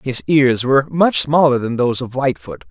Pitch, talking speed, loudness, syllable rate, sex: 130 Hz, 200 wpm, -15 LUFS, 5.4 syllables/s, male